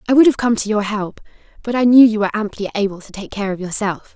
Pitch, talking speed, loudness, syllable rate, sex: 210 Hz, 275 wpm, -17 LUFS, 6.5 syllables/s, female